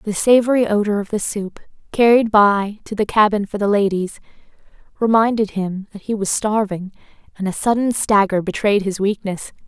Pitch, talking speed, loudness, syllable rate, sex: 205 Hz, 165 wpm, -18 LUFS, 5.1 syllables/s, female